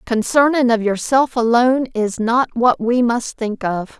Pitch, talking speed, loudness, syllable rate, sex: 235 Hz, 165 wpm, -17 LUFS, 4.3 syllables/s, female